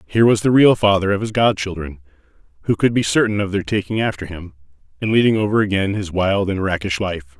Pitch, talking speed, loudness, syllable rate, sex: 100 Hz, 210 wpm, -18 LUFS, 6.2 syllables/s, male